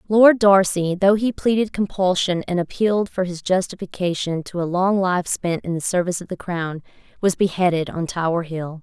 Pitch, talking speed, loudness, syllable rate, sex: 180 Hz, 185 wpm, -20 LUFS, 5.1 syllables/s, female